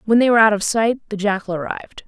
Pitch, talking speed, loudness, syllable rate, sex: 215 Hz, 260 wpm, -18 LUFS, 6.7 syllables/s, female